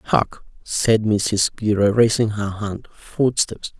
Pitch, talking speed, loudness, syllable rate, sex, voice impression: 105 Hz, 125 wpm, -20 LUFS, 3.2 syllables/s, male, masculine, adult-like, dark, calm, slightly kind